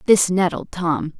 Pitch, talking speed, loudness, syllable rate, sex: 170 Hz, 150 wpm, -19 LUFS, 3.9 syllables/s, female